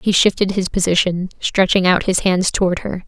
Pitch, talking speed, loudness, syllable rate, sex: 185 Hz, 195 wpm, -17 LUFS, 5.2 syllables/s, female